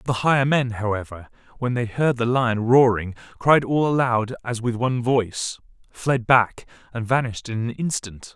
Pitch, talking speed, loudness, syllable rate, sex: 120 Hz, 170 wpm, -21 LUFS, 4.8 syllables/s, male